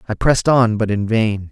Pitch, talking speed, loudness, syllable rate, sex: 110 Hz, 240 wpm, -16 LUFS, 5.3 syllables/s, male